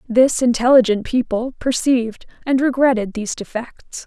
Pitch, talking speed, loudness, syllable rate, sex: 240 Hz, 120 wpm, -18 LUFS, 4.9 syllables/s, female